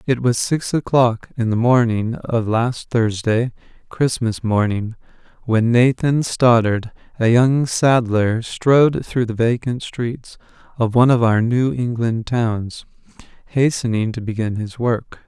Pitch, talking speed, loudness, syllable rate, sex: 120 Hz, 140 wpm, -18 LUFS, 3.8 syllables/s, male